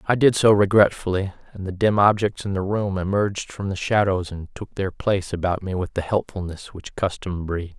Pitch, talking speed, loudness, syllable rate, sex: 95 Hz, 210 wpm, -22 LUFS, 5.2 syllables/s, male